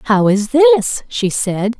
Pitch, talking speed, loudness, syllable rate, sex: 235 Hz, 170 wpm, -14 LUFS, 2.9 syllables/s, female